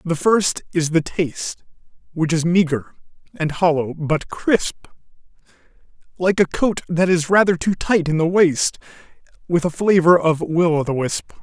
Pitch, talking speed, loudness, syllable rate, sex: 165 Hz, 160 wpm, -19 LUFS, 4.3 syllables/s, male